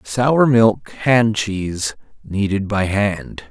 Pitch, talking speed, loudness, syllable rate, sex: 105 Hz, 120 wpm, -17 LUFS, 2.9 syllables/s, male